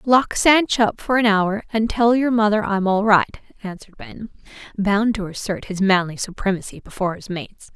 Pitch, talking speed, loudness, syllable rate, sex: 210 Hz, 185 wpm, -19 LUFS, 5.1 syllables/s, female